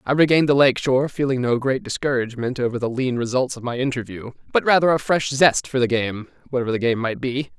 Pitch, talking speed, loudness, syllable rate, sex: 130 Hz, 230 wpm, -20 LUFS, 6.3 syllables/s, male